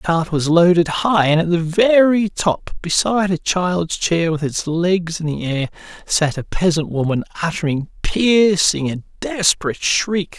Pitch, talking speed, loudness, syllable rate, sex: 175 Hz, 170 wpm, -17 LUFS, 4.3 syllables/s, male